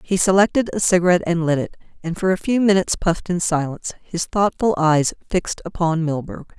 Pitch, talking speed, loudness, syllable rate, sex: 175 Hz, 190 wpm, -19 LUFS, 5.9 syllables/s, female